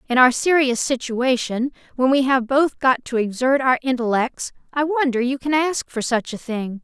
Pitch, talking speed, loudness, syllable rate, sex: 255 Hz, 195 wpm, -20 LUFS, 4.7 syllables/s, female